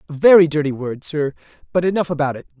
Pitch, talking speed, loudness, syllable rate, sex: 155 Hz, 210 wpm, -18 LUFS, 6.8 syllables/s, male